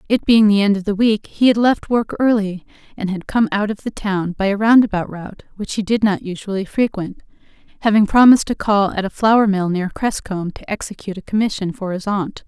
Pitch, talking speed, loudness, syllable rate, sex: 205 Hz, 225 wpm, -17 LUFS, 5.7 syllables/s, female